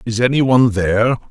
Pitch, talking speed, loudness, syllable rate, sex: 115 Hz, 185 wpm, -15 LUFS, 6.5 syllables/s, male